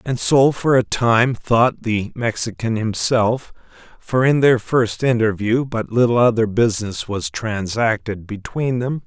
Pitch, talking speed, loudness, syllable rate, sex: 115 Hz, 145 wpm, -18 LUFS, 4.0 syllables/s, male